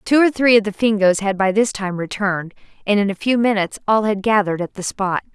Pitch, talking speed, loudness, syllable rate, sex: 205 Hz, 245 wpm, -18 LUFS, 6.1 syllables/s, female